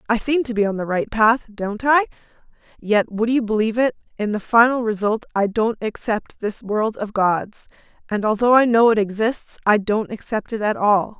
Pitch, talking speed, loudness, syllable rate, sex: 220 Hz, 205 wpm, -20 LUFS, 5.0 syllables/s, female